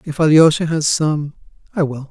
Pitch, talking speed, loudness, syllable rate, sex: 155 Hz, 170 wpm, -15 LUFS, 5.0 syllables/s, male